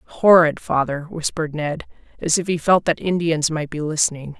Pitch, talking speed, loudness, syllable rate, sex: 160 Hz, 180 wpm, -19 LUFS, 5.0 syllables/s, female